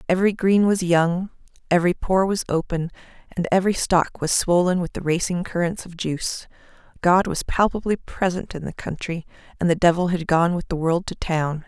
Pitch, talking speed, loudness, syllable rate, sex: 175 Hz, 180 wpm, -22 LUFS, 5.2 syllables/s, female